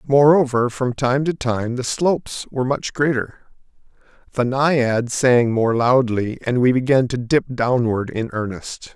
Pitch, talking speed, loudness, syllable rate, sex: 125 Hz, 155 wpm, -19 LUFS, 4.2 syllables/s, male